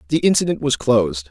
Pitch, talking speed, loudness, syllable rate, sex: 150 Hz, 185 wpm, -18 LUFS, 6.4 syllables/s, male